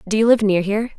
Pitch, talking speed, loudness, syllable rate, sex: 210 Hz, 305 wpm, -17 LUFS, 7.7 syllables/s, female